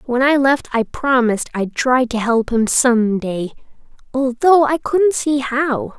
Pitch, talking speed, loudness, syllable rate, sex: 255 Hz, 160 wpm, -16 LUFS, 4.1 syllables/s, female